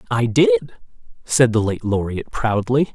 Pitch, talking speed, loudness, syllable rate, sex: 115 Hz, 140 wpm, -19 LUFS, 4.5 syllables/s, male